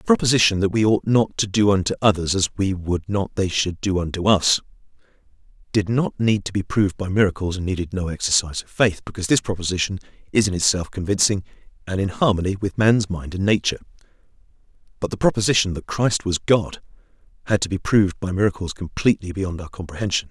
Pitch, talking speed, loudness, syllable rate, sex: 95 Hz, 190 wpm, -21 LUFS, 6.2 syllables/s, male